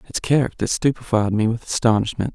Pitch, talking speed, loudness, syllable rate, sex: 115 Hz, 155 wpm, -20 LUFS, 5.9 syllables/s, male